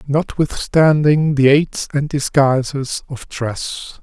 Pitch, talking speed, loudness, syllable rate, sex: 140 Hz, 105 wpm, -17 LUFS, 3.2 syllables/s, male